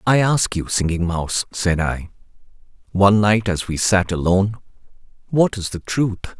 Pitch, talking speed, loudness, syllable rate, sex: 100 Hz, 160 wpm, -19 LUFS, 4.9 syllables/s, male